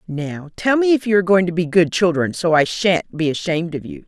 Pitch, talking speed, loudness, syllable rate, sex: 175 Hz, 265 wpm, -18 LUFS, 5.7 syllables/s, female